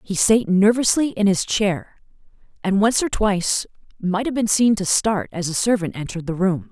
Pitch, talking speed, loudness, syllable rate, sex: 200 Hz, 195 wpm, -20 LUFS, 5.0 syllables/s, female